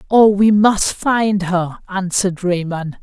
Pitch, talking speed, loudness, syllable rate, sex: 190 Hz, 140 wpm, -16 LUFS, 3.7 syllables/s, female